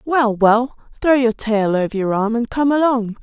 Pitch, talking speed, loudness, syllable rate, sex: 235 Hz, 205 wpm, -17 LUFS, 4.5 syllables/s, female